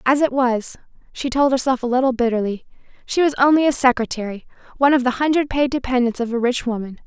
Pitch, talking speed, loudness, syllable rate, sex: 255 Hz, 205 wpm, -19 LUFS, 6.3 syllables/s, female